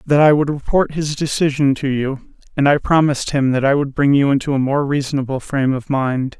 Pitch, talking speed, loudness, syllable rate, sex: 140 Hz, 225 wpm, -17 LUFS, 5.6 syllables/s, male